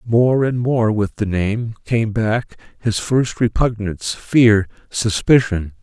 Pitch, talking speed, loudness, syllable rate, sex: 110 Hz, 125 wpm, -18 LUFS, 3.5 syllables/s, male